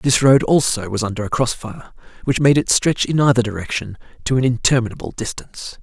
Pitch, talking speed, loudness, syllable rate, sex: 125 Hz, 195 wpm, -18 LUFS, 5.8 syllables/s, male